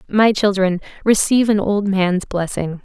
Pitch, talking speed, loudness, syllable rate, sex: 195 Hz, 150 wpm, -17 LUFS, 4.6 syllables/s, female